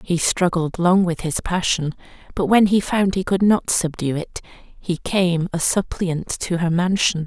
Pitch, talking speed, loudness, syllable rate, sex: 175 Hz, 180 wpm, -20 LUFS, 4.1 syllables/s, female